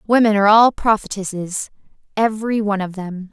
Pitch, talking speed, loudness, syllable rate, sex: 205 Hz, 145 wpm, -17 LUFS, 5.9 syllables/s, female